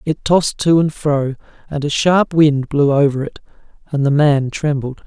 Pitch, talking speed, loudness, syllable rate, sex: 145 Hz, 190 wpm, -16 LUFS, 4.7 syllables/s, male